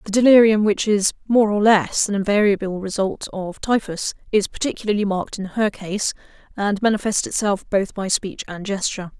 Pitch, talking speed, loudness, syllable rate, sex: 205 Hz, 170 wpm, -20 LUFS, 5.2 syllables/s, female